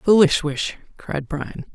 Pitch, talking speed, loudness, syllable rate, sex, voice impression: 165 Hz, 170 wpm, -21 LUFS, 4.0 syllables/s, female, feminine, adult-like, slightly cool, intellectual